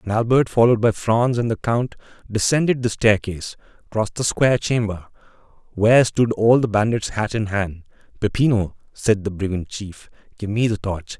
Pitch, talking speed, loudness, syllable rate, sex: 110 Hz, 170 wpm, -20 LUFS, 5.3 syllables/s, male